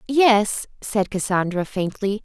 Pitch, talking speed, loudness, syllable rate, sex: 210 Hz, 105 wpm, -21 LUFS, 3.7 syllables/s, female